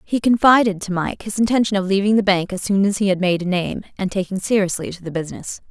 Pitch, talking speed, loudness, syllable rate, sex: 195 Hz, 250 wpm, -19 LUFS, 6.3 syllables/s, female